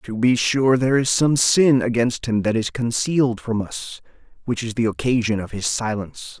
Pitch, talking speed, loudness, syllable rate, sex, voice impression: 120 Hz, 195 wpm, -20 LUFS, 4.9 syllables/s, male, masculine, adult-like, relaxed, soft, raspy, cool, intellectual, calm, friendly, reassuring, slightly wild, slightly lively, kind